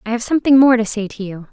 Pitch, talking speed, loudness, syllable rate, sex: 230 Hz, 315 wpm, -14 LUFS, 7.1 syllables/s, female